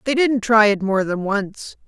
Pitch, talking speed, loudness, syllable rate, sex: 215 Hz, 225 wpm, -18 LUFS, 4.2 syllables/s, female